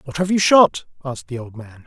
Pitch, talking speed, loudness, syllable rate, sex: 145 Hz, 255 wpm, -16 LUFS, 5.7 syllables/s, male